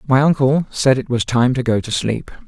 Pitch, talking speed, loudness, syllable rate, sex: 125 Hz, 245 wpm, -17 LUFS, 5.0 syllables/s, male